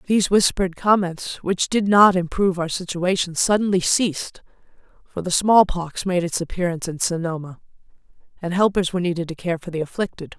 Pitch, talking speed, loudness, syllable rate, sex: 180 Hz, 160 wpm, -20 LUFS, 5.7 syllables/s, female